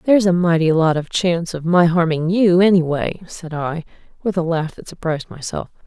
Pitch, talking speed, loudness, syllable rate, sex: 170 Hz, 195 wpm, -18 LUFS, 5.5 syllables/s, female